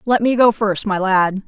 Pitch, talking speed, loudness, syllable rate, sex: 205 Hz, 245 wpm, -16 LUFS, 4.5 syllables/s, female